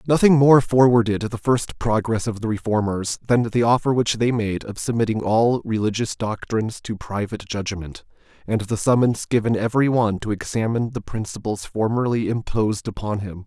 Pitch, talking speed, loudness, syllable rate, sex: 110 Hz, 165 wpm, -21 LUFS, 5.4 syllables/s, male